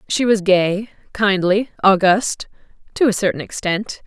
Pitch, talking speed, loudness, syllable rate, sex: 200 Hz, 120 wpm, -17 LUFS, 4.2 syllables/s, female